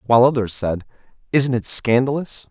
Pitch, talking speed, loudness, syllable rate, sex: 120 Hz, 120 wpm, -18 LUFS, 5.4 syllables/s, male